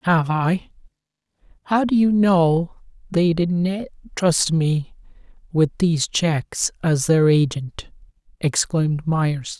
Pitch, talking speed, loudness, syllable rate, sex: 165 Hz, 115 wpm, -20 LUFS, 3.5 syllables/s, male